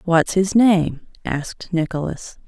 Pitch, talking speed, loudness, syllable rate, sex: 175 Hz, 120 wpm, -19 LUFS, 3.8 syllables/s, female